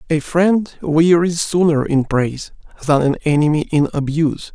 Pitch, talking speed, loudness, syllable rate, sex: 155 Hz, 145 wpm, -16 LUFS, 4.7 syllables/s, male